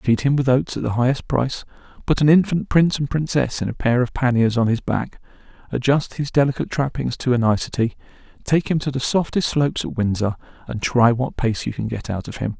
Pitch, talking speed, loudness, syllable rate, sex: 130 Hz, 225 wpm, -20 LUFS, 5.8 syllables/s, male